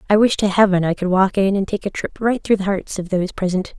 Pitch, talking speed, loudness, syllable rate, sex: 195 Hz, 300 wpm, -18 LUFS, 6.1 syllables/s, female